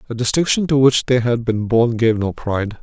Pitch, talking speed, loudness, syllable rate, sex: 120 Hz, 235 wpm, -17 LUFS, 5.4 syllables/s, male